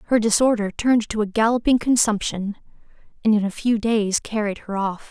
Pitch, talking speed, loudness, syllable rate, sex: 215 Hz, 175 wpm, -21 LUFS, 5.5 syllables/s, female